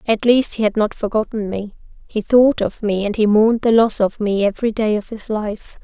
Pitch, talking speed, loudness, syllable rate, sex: 215 Hz, 235 wpm, -17 LUFS, 5.2 syllables/s, female